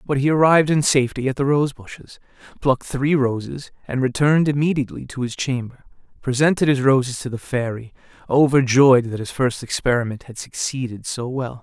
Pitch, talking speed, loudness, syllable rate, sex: 130 Hz, 170 wpm, -19 LUFS, 5.7 syllables/s, male